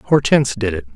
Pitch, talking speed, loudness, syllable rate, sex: 110 Hz, 190 wpm, -17 LUFS, 5.8 syllables/s, male